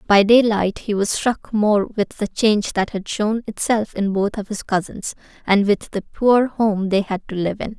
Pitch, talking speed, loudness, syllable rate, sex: 210 Hz, 215 wpm, -19 LUFS, 4.4 syllables/s, female